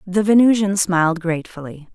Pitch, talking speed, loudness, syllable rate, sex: 185 Hz, 125 wpm, -17 LUFS, 5.6 syllables/s, female